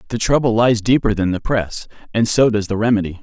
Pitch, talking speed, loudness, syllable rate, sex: 110 Hz, 225 wpm, -17 LUFS, 5.8 syllables/s, male